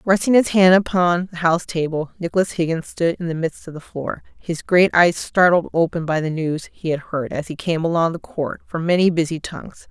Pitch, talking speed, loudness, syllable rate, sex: 170 Hz, 225 wpm, -19 LUFS, 5.3 syllables/s, female